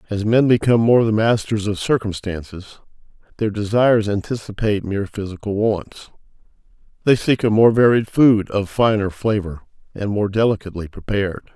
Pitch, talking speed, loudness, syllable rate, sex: 105 Hz, 140 wpm, -18 LUFS, 5.5 syllables/s, male